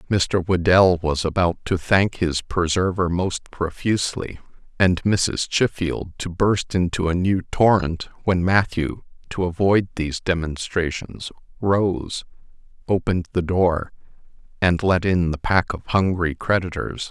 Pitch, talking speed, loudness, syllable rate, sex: 90 Hz, 130 wpm, -21 LUFS, 4.1 syllables/s, male